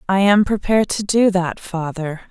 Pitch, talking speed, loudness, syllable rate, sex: 190 Hz, 180 wpm, -18 LUFS, 4.8 syllables/s, female